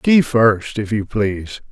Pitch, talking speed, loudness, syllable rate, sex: 110 Hz, 175 wpm, -17 LUFS, 3.7 syllables/s, male